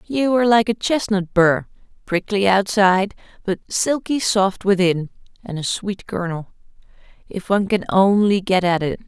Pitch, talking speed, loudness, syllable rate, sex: 200 Hz, 150 wpm, -19 LUFS, 4.7 syllables/s, female